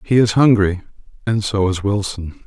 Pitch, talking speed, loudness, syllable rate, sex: 100 Hz, 170 wpm, -17 LUFS, 4.9 syllables/s, male